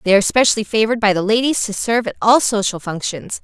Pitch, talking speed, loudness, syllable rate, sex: 215 Hz, 225 wpm, -16 LUFS, 7.0 syllables/s, female